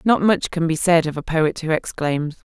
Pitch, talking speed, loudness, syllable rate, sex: 165 Hz, 240 wpm, -20 LUFS, 4.8 syllables/s, female